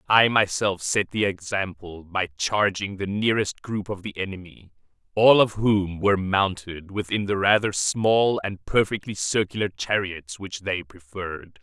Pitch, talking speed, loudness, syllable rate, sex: 95 Hz, 150 wpm, -23 LUFS, 4.4 syllables/s, male